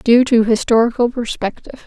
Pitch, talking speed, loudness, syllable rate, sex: 235 Hz, 130 wpm, -15 LUFS, 5.5 syllables/s, female